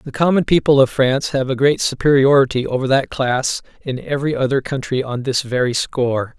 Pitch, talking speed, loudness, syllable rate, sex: 135 Hz, 190 wpm, -17 LUFS, 5.5 syllables/s, male